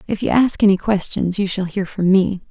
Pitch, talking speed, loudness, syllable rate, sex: 195 Hz, 240 wpm, -18 LUFS, 5.3 syllables/s, female